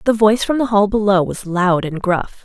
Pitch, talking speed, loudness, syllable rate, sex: 200 Hz, 245 wpm, -16 LUFS, 5.2 syllables/s, female